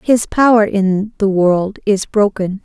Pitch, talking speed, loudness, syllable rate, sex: 205 Hz, 160 wpm, -14 LUFS, 3.7 syllables/s, female